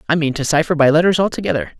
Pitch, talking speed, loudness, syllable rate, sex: 150 Hz, 235 wpm, -16 LUFS, 7.6 syllables/s, male